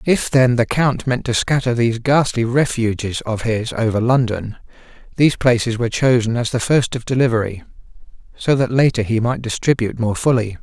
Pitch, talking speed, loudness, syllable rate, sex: 120 Hz, 175 wpm, -17 LUFS, 5.5 syllables/s, male